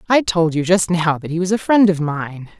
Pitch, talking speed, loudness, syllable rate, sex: 175 Hz, 275 wpm, -17 LUFS, 5.2 syllables/s, female